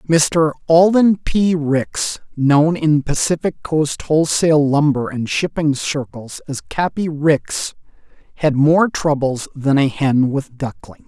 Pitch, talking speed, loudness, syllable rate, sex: 150 Hz, 130 wpm, -17 LUFS, 3.7 syllables/s, male